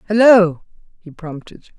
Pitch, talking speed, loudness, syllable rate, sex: 190 Hz, 100 wpm, -12 LUFS, 4.4 syllables/s, female